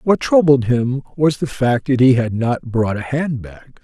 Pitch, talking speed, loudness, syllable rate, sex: 130 Hz, 205 wpm, -17 LUFS, 4.5 syllables/s, male